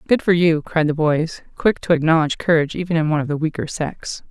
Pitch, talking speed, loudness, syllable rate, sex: 160 Hz, 235 wpm, -19 LUFS, 6.3 syllables/s, female